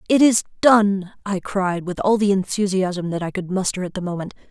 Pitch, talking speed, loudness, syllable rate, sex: 190 Hz, 215 wpm, -20 LUFS, 5.2 syllables/s, female